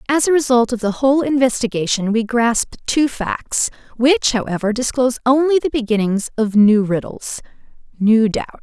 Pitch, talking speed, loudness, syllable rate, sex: 240 Hz, 155 wpm, -17 LUFS, 5.0 syllables/s, female